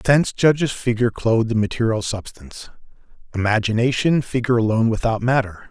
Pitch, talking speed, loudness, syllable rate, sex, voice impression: 115 Hz, 125 wpm, -19 LUFS, 6.3 syllables/s, male, masculine, adult-like, slightly thick, tensed, powerful, raspy, cool, mature, friendly, wild, lively, slightly sharp